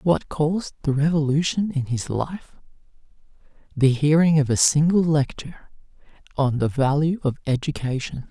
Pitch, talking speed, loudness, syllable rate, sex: 150 Hz, 130 wpm, -21 LUFS, 4.8 syllables/s, male